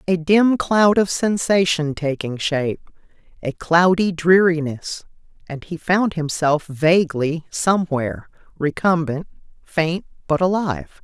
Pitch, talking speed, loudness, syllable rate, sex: 170 Hz, 110 wpm, -19 LUFS, 4.1 syllables/s, female